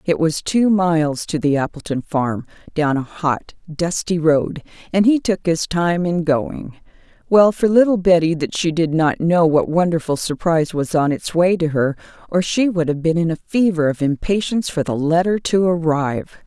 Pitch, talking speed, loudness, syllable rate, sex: 165 Hz, 195 wpm, -18 LUFS, 4.8 syllables/s, female